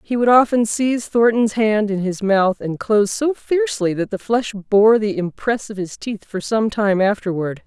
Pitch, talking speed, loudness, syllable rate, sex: 210 Hz, 205 wpm, -18 LUFS, 4.6 syllables/s, female